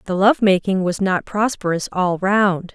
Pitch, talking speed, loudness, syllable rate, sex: 190 Hz, 175 wpm, -18 LUFS, 4.3 syllables/s, female